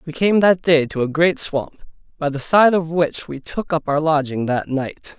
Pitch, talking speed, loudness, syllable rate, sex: 155 Hz, 230 wpm, -18 LUFS, 4.4 syllables/s, male